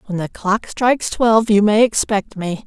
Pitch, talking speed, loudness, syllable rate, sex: 210 Hz, 205 wpm, -17 LUFS, 4.8 syllables/s, female